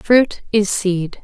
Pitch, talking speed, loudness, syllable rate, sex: 205 Hz, 145 wpm, -17 LUFS, 2.7 syllables/s, female